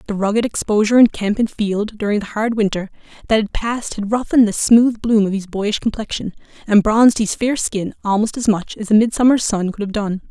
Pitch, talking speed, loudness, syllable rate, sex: 215 Hz, 220 wpm, -17 LUFS, 5.7 syllables/s, female